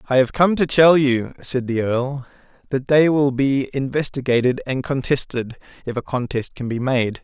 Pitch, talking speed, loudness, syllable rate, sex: 130 Hz, 180 wpm, -19 LUFS, 4.6 syllables/s, male